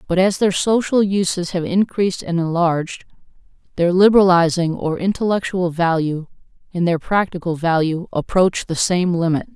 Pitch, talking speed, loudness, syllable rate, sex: 180 Hz, 140 wpm, -18 LUFS, 5.0 syllables/s, female